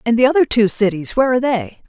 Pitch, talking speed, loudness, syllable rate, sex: 235 Hz, 225 wpm, -16 LUFS, 6.9 syllables/s, female